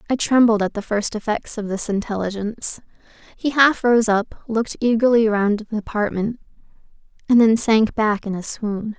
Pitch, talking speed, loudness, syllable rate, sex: 220 Hz, 165 wpm, -19 LUFS, 5.0 syllables/s, female